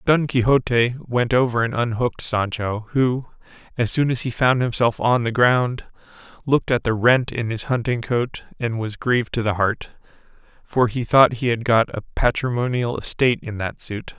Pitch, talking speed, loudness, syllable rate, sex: 120 Hz, 180 wpm, -20 LUFS, 4.8 syllables/s, male